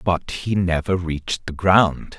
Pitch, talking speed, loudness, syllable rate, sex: 90 Hz, 165 wpm, -20 LUFS, 3.9 syllables/s, male